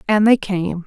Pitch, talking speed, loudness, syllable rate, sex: 195 Hz, 210 wpm, -17 LUFS, 4.2 syllables/s, female